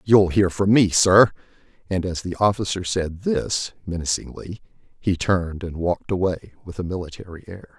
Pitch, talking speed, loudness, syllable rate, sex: 90 Hz, 160 wpm, -21 LUFS, 5.1 syllables/s, male